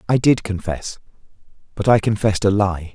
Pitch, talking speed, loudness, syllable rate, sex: 100 Hz, 165 wpm, -19 LUFS, 5.5 syllables/s, male